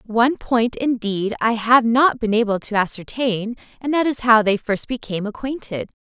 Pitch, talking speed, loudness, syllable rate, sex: 230 Hz, 180 wpm, -19 LUFS, 4.9 syllables/s, female